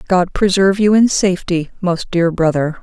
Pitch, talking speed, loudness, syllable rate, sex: 185 Hz, 170 wpm, -15 LUFS, 5.1 syllables/s, female